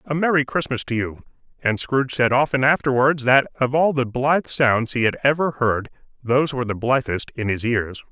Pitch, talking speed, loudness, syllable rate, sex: 130 Hz, 200 wpm, -20 LUFS, 5.4 syllables/s, male